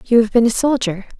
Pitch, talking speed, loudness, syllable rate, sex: 230 Hz, 250 wpm, -16 LUFS, 6.1 syllables/s, female